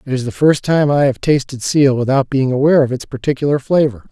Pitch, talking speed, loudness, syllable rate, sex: 135 Hz, 235 wpm, -15 LUFS, 6.0 syllables/s, male